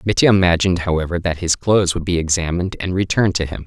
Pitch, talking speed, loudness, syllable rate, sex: 90 Hz, 215 wpm, -18 LUFS, 7.0 syllables/s, male